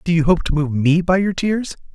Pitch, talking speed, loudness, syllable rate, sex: 170 Hz, 280 wpm, -18 LUFS, 5.4 syllables/s, male